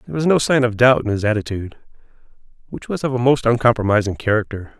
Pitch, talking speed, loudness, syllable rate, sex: 120 Hz, 200 wpm, -18 LUFS, 7.1 syllables/s, male